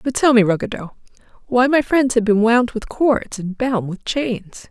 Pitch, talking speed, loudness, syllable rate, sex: 230 Hz, 205 wpm, -18 LUFS, 4.4 syllables/s, female